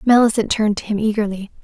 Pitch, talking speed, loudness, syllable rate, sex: 215 Hz, 185 wpm, -18 LUFS, 6.9 syllables/s, female